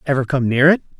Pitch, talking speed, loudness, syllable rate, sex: 135 Hz, 240 wpm, -16 LUFS, 6.9 syllables/s, male